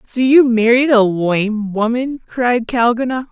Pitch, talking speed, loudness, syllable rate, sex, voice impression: 235 Hz, 145 wpm, -15 LUFS, 3.8 syllables/s, female, very feminine, middle-aged, slightly muffled, slightly calm, elegant